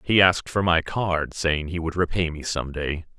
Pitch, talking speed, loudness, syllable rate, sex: 85 Hz, 225 wpm, -23 LUFS, 4.7 syllables/s, male